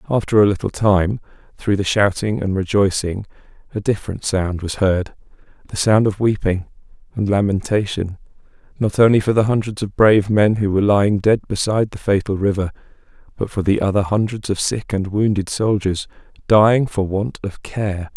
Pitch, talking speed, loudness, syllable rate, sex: 100 Hz, 170 wpm, -18 LUFS, 5.3 syllables/s, male